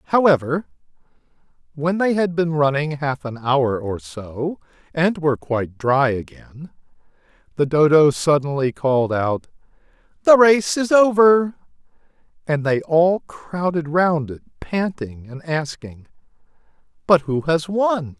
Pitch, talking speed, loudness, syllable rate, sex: 155 Hz, 125 wpm, -19 LUFS, 4.1 syllables/s, male